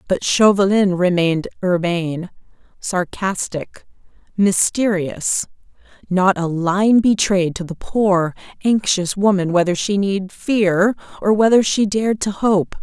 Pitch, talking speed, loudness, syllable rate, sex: 190 Hz, 115 wpm, -17 LUFS, 4.0 syllables/s, female